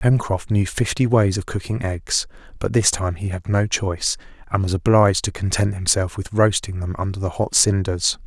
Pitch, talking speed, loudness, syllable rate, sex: 100 Hz, 195 wpm, -20 LUFS, 5.0 syllables/s, male